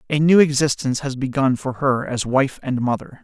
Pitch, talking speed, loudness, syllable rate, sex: 135 Hz, 205 wpm, -19 LUFS, 5.3 syllables/s, male